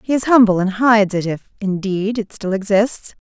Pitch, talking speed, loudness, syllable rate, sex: 205 Hz, 205 wpm, -17 LUFS, 5.0 syllables/s, female